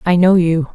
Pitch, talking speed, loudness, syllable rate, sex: 175 Hz, 240 wpm, -13 LUFS, 4.9 syllables/s, female